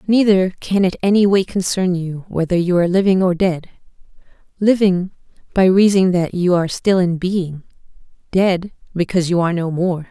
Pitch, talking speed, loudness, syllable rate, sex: 180 Hz, 165 wpm, -17 LUFS, 5.2 syllables/s, female